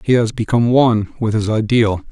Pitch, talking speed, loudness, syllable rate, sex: 115 Hz, 200 wpm, -16 LUFS, 5.8 syllables/s, male